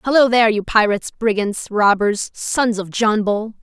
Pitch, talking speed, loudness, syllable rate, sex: 215 Hz, 165 wpm, -17 LUFS, 4.9 syllables/s, female